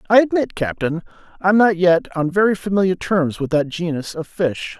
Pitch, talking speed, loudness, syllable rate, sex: 180 Hz, 190 wpm, -18 LUFS, 5.0 syllables/s, male